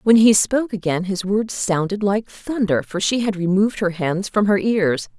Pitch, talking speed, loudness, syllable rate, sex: 200 Hz, 210 wpm, -19 LUFS, 4.8 syllables/s, female